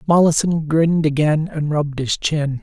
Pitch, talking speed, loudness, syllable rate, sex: 155 Hz, 160 wpm, -18 LUFS, 4.8 syllables/s, male